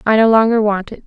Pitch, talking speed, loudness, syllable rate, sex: 215 Hz, 280 wpm, -14 LUFS, 6.3 syllables/s, female